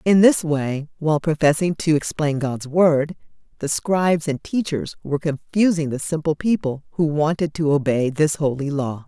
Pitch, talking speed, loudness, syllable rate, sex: 155 Hz, 165 wpm, -21 LUFS, 4.8 syllables/s, female